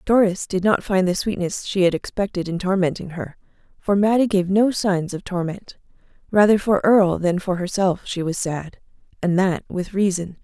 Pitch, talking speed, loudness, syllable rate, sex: 185 Hz, 180 wpm, -20 LUFS, 5.0 syllables/s, female